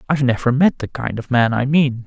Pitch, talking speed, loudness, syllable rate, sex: 130 Hz, 260 wpm, -17 LUFS, 5.8 syllables/s, male